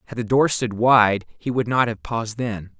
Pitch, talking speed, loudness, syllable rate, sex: 115 Hz, 235 wpm, -20 LUFS, 4.7 syllables/s, male